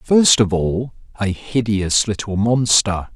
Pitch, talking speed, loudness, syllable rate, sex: 105 Hz, 135 wpm, -17 LUFS, 3.6 syllables/s, male